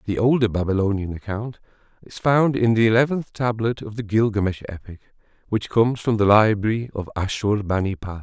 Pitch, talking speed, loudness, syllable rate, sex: 110 Hz, 155 wpm, -21 LUFS, 5.6 syllables/s, male